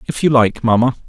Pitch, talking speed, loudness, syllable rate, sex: 120 Hz, 220 wpm, -15 LUFS, 6.0 syllables/s, male